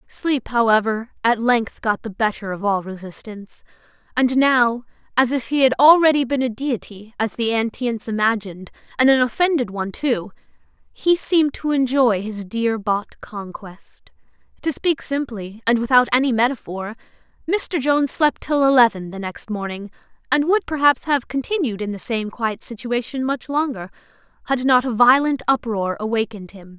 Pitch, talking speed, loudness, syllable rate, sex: 240 Hz, 155 wpm, -20 LUFS, 4.9 syllables/s, female